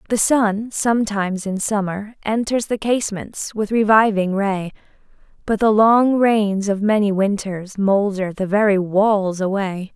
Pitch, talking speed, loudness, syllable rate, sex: 205 Hz, 140 wpm, -18 LUFS, 4.2 syllables/s, female